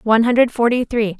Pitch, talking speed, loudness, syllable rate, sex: 230 Hz, 200 wpm, -16 LUFS, 6.4 syllables/s, female